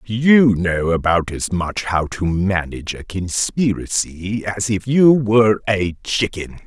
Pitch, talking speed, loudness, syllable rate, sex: 100 Hz, 145 wpm, -18 LUFS, 3.9 syllables/s, male